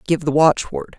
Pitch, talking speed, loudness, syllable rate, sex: 155 Hz, 185 wpm, -17 LUFS, 4.8 syllables/s, female